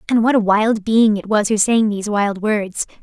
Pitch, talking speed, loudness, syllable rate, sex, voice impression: 210 Hz, 240 wpm, -17 LUFS, 4.8 syllables/s, female, feminine, slightly young, slightly fluent, cute, slightly unique, slightly lively